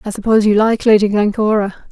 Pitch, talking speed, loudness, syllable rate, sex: 210 Hz, 190 wpm, -14 LUFS, 6.2 syllables/s, female